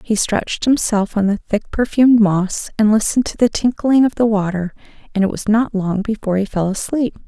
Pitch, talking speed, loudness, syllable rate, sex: 215 Hz, 205 wpm, -17 LUFS, 5.4 syllables/s, female